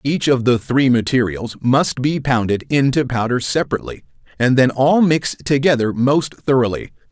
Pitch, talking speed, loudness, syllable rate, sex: 130 Hz, 150 wpm, -17 LUFS, 5.0 syllables/s, male